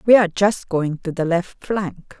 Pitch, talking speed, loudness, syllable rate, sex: 180 Hz, 220 wpm, -20 LUFS, 4.4 syllables/s, female